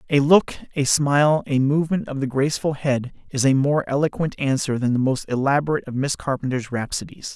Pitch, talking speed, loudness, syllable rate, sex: 140 Hz, 190 wpm, -21 LUFS, 5.8 syllables/s, male